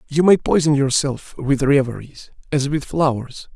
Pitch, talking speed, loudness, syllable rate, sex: 145 Hz, 150 wpm, -18 LUFS, 4.5 syllables/s, male